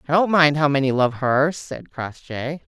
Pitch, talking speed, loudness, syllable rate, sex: 145 Hz, 195 wpm, -20 LUFS, 4.4 syllables/s, female